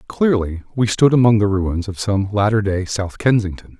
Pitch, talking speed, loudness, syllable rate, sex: 105 Hz, 190 wpm, -17 LUFS, 4.9 syllables/s, male